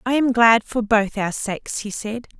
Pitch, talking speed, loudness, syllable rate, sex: 225 Hz, 225 wpm, -20 LUFS, 4.6 syllables/s, female